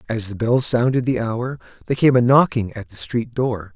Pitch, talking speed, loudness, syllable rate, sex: 120 Hz, 225 wpm, -19 LUFS, 5.2 syllables/s, male